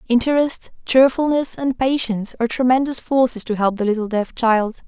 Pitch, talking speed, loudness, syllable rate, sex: 245 Hz, 160 wpm, -18 LUFS, 5.4 syllables/s, female